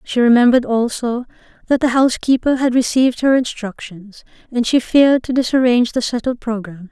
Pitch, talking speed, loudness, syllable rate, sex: 245 Hz, 155 wpm, -16 LUFS, 5.9 syllables/s, female